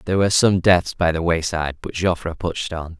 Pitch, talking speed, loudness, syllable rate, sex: 85 Hz, 220 wpm, -20 LUFS, 5.9 syllables/s, male